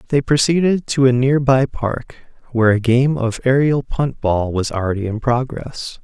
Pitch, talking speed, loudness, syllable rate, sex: 125 Hz, 180 wpm, -17 LUFS, 4.6 syllables/s, male